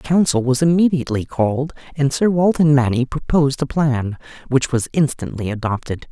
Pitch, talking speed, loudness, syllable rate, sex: 140 Hz, 155 wpm, -18 LUFS, 5.5 syllables/s, male